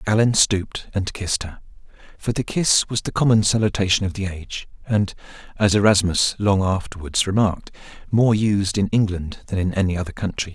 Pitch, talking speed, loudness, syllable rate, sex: 100 Hz, 170 wpm, -20 LUFS, 5.6 syllables/s, male